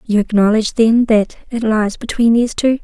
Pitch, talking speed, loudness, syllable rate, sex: 225 Hz, 190 wpm, -15 LUFS, 5.5 syllables/s, female